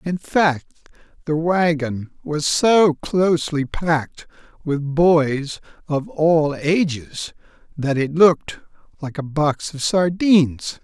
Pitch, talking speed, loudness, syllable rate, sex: 155 Hz, 115 wpm, -19 LUFS, 3.4 syllables/s, male